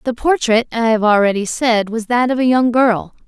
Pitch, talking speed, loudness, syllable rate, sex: 235 Hz, 220 wpm, -15 LUFS, 5.0 syllables/s, female